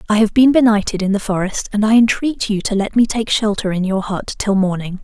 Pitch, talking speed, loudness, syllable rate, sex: 210 Hz, 250 wpm, -16 LUFS, 5.6 syllables/s, female